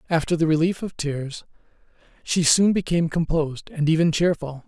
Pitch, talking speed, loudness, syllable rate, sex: 160 Hz, 155 wpm, -22 LUFS, 5.4 syllables/s, male